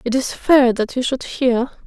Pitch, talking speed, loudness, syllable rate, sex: 250 Hz, 225 wpm, -18 LUFS, 4.2 syllables/s, female